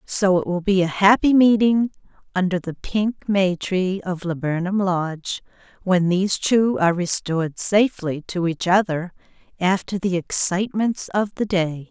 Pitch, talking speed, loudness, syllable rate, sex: 185 Hz, 150 wpm, -20 LUFS, 4.5 syllables/s, female